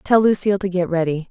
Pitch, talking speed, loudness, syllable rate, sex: 185 Hz, 230 wpm, -19 LUFS, 6.3 syllables/s, female